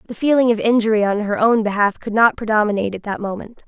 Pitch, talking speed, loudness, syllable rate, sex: 215 Hz, 230 wpm, -17 LUFS, 6.6 syllables/s, female